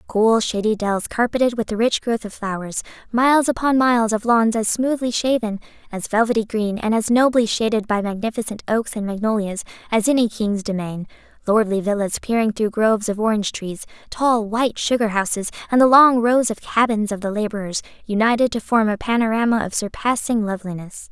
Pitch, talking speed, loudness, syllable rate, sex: 220 Hz, 180 wpm, -19 LUFS, 5.6 syllables/s, female